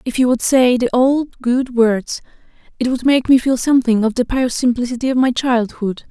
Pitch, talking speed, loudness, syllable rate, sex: 250 Hz, 205 wpm, -16 LUFS, 5.1 syllables/s, female